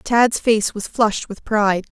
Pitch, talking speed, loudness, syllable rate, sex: 215 Hz, 180 wpm, -19 LUFS, 4.3 syllables/s, female